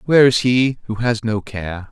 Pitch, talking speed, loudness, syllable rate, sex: 115 Hz, 220 wpm, -18 LUFS, 4.8 syllables/s, male